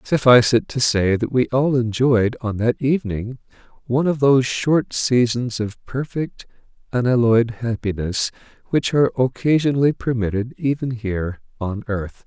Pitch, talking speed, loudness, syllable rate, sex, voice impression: 120 Hz, 135 wpm, -20 LUFS, 4.8 syllables/s, male, very masculine, very adult-like, very middle-aged, very thick, tensed, powerful, bright, soft, very clear, fluent, very cool, very intellectual, sincere, very calm, very mature, very friendly, very reassuring, unique, very elegant, slightly wild, sweet, slightly lively, very kind, slightly modest